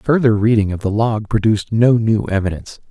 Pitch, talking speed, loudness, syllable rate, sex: 110 Hz, 185 wpm, -16 LUFS, 5.7 syllables/s, male